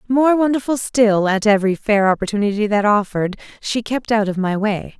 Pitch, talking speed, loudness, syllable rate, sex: 215 Hz, 180 wpm, -17 LUFS, 5.5 syllables/s, female